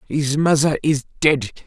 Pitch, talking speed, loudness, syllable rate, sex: 145 Hz, 145 wpm, -18 LUFS, 4.2 syllables/s, male